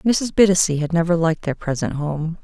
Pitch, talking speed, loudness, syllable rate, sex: 170 Hz, 195 wpm, -19 LUFS, 5.5 syllables/s, female